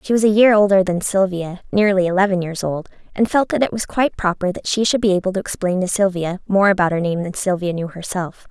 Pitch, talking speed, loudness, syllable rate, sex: 190 Hz, 245 wpm, -18 LUFS, 6.0 syllables/s, female